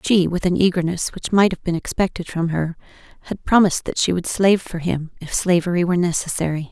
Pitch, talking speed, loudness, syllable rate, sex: 175 Hz, 205 wpm, -20 LUFS, 6.0 syllables/s, female